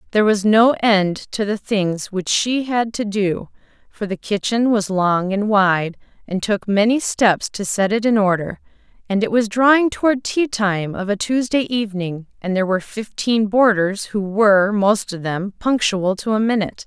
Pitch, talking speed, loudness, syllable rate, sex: 210 Hz, 190 wpm, -18 LUFS, 4.6 syllables/s, female